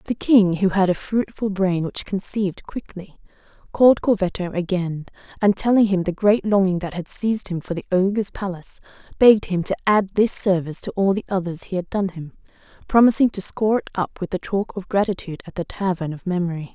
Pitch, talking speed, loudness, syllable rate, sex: 190 Hz, 200 wpm, -21 LUFS, 5.8 syllables/s, female